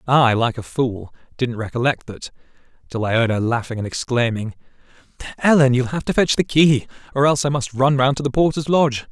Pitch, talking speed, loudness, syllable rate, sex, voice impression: 130 Hz, 195 wpm, -19 LUFS, 5.8 syllables/s, male, very masculine, very adult-like, middle-aged, very thick, very tensed, powerful, slightly bright, slightly soft, clear, fluent, intellectual, sincere, very calm, slightly mature, very reassuring, slightly elegant, sweet, lively, kind